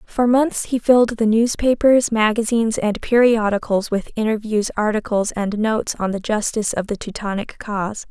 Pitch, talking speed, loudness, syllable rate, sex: 220 Hz, 155 wpm, -19 LUFS, 5.1 syllables/s, female